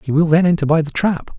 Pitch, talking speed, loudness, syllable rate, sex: 160 Hz, 305 wpm, -16 LUFS, 6.5 syllables/s, male